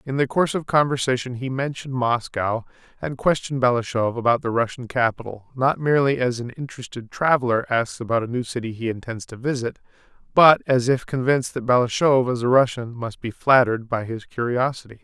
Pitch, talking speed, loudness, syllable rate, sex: 125 Hz, 180 wpm, -21 LUFS, 5.8 syllables/s, male